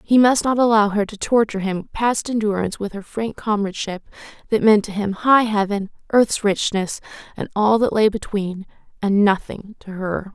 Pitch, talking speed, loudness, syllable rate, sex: 210 Hz, 180 wpm, -19 LUFS, 5.0 syllables/s, female